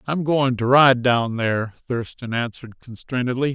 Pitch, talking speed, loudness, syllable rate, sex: 125 Hz, 150 wpm, -20 LUFS, 4.7 syllables/s, male